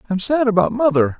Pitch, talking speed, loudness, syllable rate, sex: 145 Hz, 250 wpm, -17 LUFS, 7.1 syllables/s, male